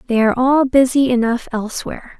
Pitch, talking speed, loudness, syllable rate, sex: 250 Hz, 165 wpm, -16 LUFS, 6.2 syllables/s, female